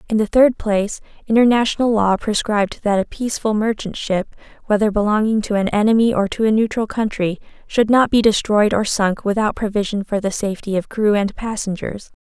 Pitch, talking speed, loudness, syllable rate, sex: 210 Hz, 180 wpm, -18 LUFS, 5.6 syllables/s, female